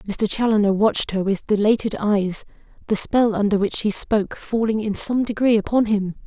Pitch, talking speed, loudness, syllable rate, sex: 210 Hz, 180 wpm, -20 LUFS, 5.1 syllables/s, female